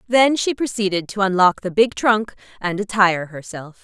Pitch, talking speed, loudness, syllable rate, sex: 200 Hz, 170 wpm, -18 LUFS, 5.0 syllables/s, female